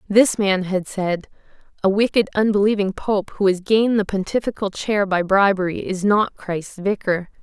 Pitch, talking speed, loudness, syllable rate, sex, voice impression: 200 Hz, 160 wpm, -20 LUFS, 4.8 syllables/s, female, very feminine, slightly young, slightly adult-like, slightly tensed, slightly weak, bright, slightly hard, clear, fluent, very cute, slightly cool, very intellectual, refreshing, very sincere, slightly calm, friendly, very reassuring, unique, very elegant, very sweet, slightly lively, kind